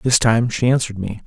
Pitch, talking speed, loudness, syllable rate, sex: 115 Hz, 235 wpm, -18 LUFS, 6.1 syllables/s, male